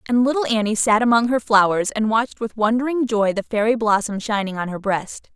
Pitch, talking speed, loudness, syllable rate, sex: 220 Hz, 215 wpm, -19 LUFS, 5.7 syllables/s, female